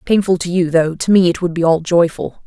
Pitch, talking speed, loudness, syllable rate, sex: 175 Hz, 270 wpm, -15 LUFS, 5.5 syllables/s, female